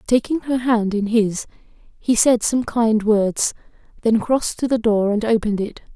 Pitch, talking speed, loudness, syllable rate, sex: 225 Hz, 180 wpm, -19 LUFS, 4.3 syllables/s, female